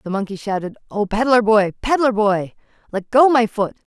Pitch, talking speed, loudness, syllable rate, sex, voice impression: 220 Hz, 180 wpm, -18 LUFS, 5.1 syllables/s, female, feminine, adult-like, middle-aged, slightly thin, slightly tensed, slightly powerful, bright, slightly soft, clear, fluent, cool, refreshing, sincere, slightly calm, friendly, reassuring, slightly unique, slightly elegant, slightly sweet, lively, strict